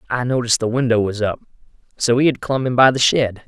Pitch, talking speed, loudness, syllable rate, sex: 120 Hz, 240 wpm, -17 LUFS, 6.1 syllables/s, male